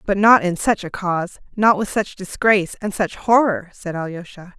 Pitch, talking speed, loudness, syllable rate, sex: 195 Hz, 195 wpm, -19 LUFS, 5.0 syllables/s, female